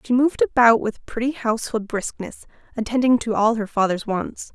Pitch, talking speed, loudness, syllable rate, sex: 230 Hz, 170 wpm, -21 LUFS, 5.4 syllables/s, female